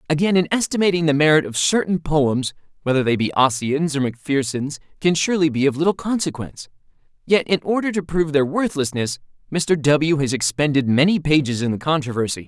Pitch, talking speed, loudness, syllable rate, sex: 150 Hz, 175 wpm, -19 LUFS, 5.8 syllables/s, male